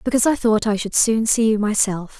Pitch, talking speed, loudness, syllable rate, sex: 220 Hz, 245 wpm, -18 LUFS, 5.7 syllables/s, female